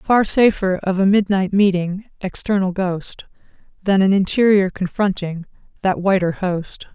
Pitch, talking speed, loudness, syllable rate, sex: 190 Hz, 130 wpm, -18 LUFS, 4.3 syllables/s, female